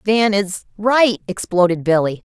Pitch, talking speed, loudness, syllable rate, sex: 200 Hz, 105 wpm, -17 LUFS, 4.2 syllables/s, female